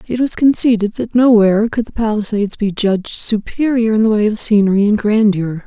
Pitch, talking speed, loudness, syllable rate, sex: 215 Hz, 190 wpm, -14 LUFS, 5.6 syllables/s, female